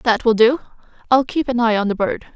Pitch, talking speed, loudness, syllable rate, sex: 235 Hz, 255 wpm, -17 LUFS, 5.5 syllables/s, female